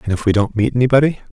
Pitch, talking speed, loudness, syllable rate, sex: 115 Hz, 260 wpm, -16 LUFS, 7.8 syllables/s, male